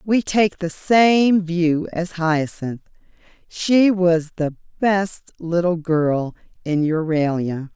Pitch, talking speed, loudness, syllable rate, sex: 170 Hz, 115 wpm, -19 LUFS, 3.1 syllables/s, female